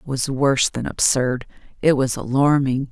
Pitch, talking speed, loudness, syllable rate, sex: 135 Hz, 165 wpm, -19 LUFS, 4.7 syllables/s, female